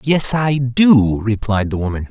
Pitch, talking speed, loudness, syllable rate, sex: 120 Hz, 170 wpm, -15 LUFS, 4.1 syllables/s, male